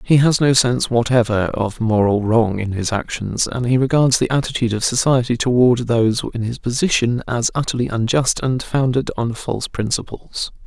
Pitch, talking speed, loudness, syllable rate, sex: 120 Hz, 175 wpm, -18 LUFS, 5.2 syllables/s, male